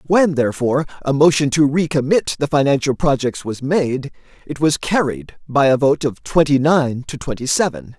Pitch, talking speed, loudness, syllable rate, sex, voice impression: 145 Hz, 175 wpm, -17 LUFS, 5.0 syllables/s, male, very masculine, very adult-like, middle-aged, thick, very tensed, powerful, bright, very hard, very clear, very fluent, slightly raspy, cool, very intellectual, very refreshing, sincere, slightly mature, slightly friendly, slightly reassuring, very unique, slightly elegant, wild, slightly lively, strict, intense